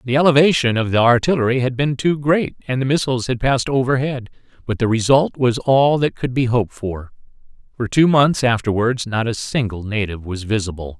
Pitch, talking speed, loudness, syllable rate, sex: 125 Hz, 190 wpm, -18 LUFS, 5.6 syllables/s, male